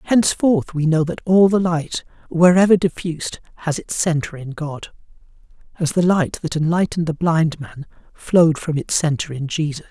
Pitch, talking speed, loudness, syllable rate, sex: 165 Hz, 170 wpm, -19 LUFS, 5.0 syllables/s, male